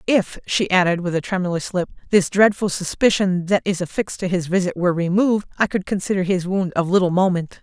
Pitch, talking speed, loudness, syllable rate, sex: 185 Hz, 205 wpm, -20 LUFS, 6.0 syllables/s, female